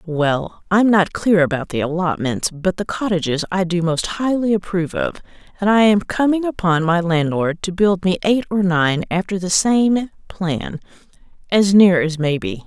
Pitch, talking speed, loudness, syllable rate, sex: 180 Hz, 180 wpm, -18 LUFS, 4.5 syllables/s, female